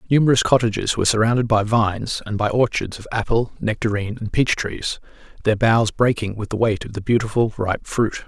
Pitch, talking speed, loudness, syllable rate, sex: 110 Hz, 180 wpm, -20 LUFS, 5.8 syllables/s, male